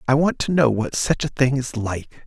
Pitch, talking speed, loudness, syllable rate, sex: 130 Hz, 265 wpm, -21 LUFS, 4.8 syllables/s, male